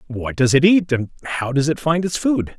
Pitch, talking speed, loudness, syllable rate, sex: 145 Hz, 255 wpm, -18 LUFS, 5.2 syllables/s, male